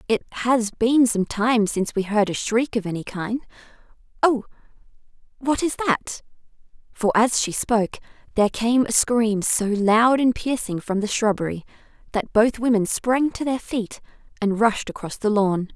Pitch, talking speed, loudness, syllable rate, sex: 225 Hz, 160 wpm, -21 LUFS, 4.6 syllables/s, female